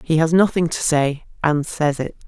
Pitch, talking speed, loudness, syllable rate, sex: 155 Hz, 210 wpm, -19 LUFS, 4.6 syllables/s, female